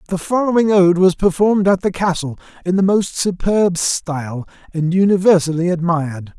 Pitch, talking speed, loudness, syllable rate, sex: 180 Hz, 150 wpm, -16 LUFS, 5.4 syllables/s, male